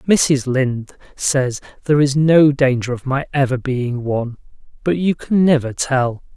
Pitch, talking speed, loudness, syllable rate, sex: 135 Hz, 160 wpm, -17 LUFS, 4.4 syllables/s, male